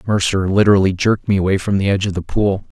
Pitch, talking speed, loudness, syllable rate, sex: 95 Hz, 235 wpm, -16 LUFS, 7.1 syllables/s, male